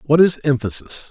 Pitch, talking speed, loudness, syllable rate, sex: 140 Hz, 165 wpm, -17 LUFS, 5.0 syllables/s, male